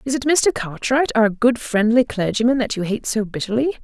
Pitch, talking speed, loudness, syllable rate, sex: 235 Hz, 205 wpm, -19 LUFS, 5.4 syllables/s, female